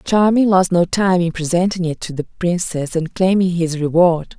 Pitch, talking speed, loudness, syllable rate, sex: 175 Hz, 190 wpm, -17 LUFS, 4.8 syllables/s, female